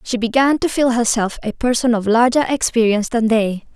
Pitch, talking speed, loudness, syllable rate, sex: 235 Hz, 190 wpm, -17 LUFS, 5.4 syllables/s, female